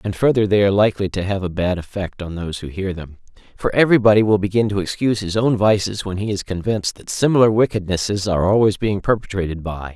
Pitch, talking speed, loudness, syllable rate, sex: 100 Hz, 215 wpm, -19 LUFS, 6.6 syllables/s, male